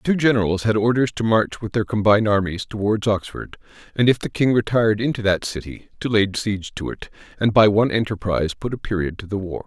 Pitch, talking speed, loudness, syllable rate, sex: 105 Hz, 225 wpm, -20 LUFS, 6.3 syllables/s, male